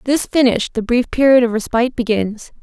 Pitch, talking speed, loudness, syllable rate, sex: 240 Hz, 185 wpm, -16 LUFS, 5.8 syllables/s, female